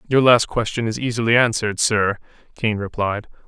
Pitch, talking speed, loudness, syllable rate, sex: 110 Hz, 155 wpm, -19 LUFS, 5.4 syllables/s, male